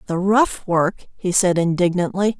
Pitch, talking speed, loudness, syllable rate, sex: 185 Hz, 150 wpm, -19 LUFS, 4.1 syllables/s, female